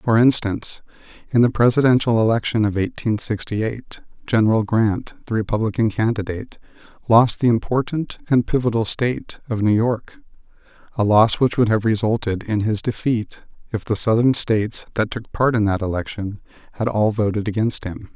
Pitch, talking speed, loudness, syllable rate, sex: 110 Hz, 160 wpm, -20 LUFS, 5.2 syllables/s, male